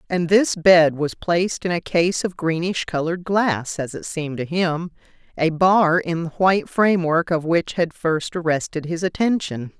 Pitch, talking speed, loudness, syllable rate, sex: 170 Hz, 185 wpm, -20 LUFS, 4.3 syllables/s, female